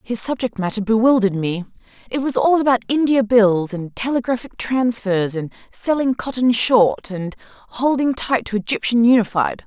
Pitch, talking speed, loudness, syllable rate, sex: 230 Hz, 150 wpm, -18 LUFS, 5.0 syllables/s, female